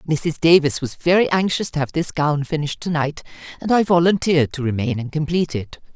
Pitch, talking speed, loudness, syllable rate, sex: 155 Hz, 200 wpm, -19 LUFS, 6.0 syllables/s, female